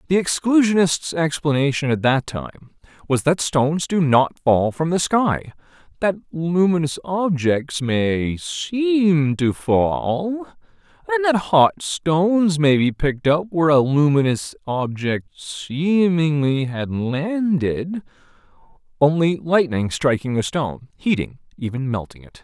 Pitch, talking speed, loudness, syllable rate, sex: 155 Hz, 120 wpm, -20 LUFS, 3.9 syllables/s, male